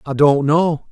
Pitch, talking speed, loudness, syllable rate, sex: 150 Hz, 195 wpm, -15 LUFS, 3.8 syllables/s, male